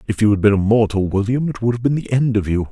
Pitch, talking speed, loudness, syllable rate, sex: 110 Hz, 330 wpm, -17 LUFS, 6.7 syllables/s, male